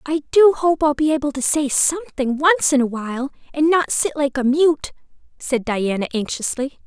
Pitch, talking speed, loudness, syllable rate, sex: 285 Hz, 190 wpm, -19 LUFS, 5.0 syllables/s, female